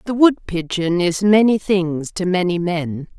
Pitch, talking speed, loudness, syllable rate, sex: 185 Hz, 150 wpm, -18 LUFS, 4.0 syllables/s, female